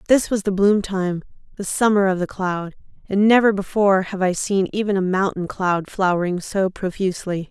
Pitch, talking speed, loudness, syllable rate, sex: 190 Hz, 185 wpm, -20 LUFS, 5.1 syllables/s, female